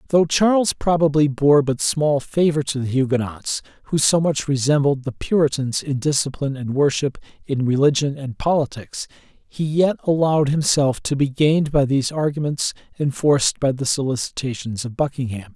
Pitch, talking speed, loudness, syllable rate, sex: 140 Hz, 155 wpm, -20 LUFS, 5.1 syllables/s, male